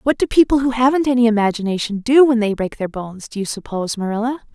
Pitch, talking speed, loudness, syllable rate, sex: 230 Hz, 225 wpm, -17 LUFS, 6.7 syllables/s, female